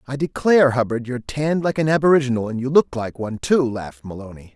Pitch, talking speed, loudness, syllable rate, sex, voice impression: 130 Hz, 210 wpm, -19 LUFS, 6.6 syllables/s, male, very masculine, very adult-like, refreshing